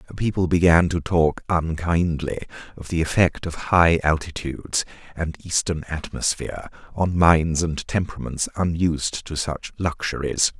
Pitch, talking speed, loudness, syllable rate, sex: 85 Hz, 125 wpm, -22 LUFS, 4.6 syllables/s, male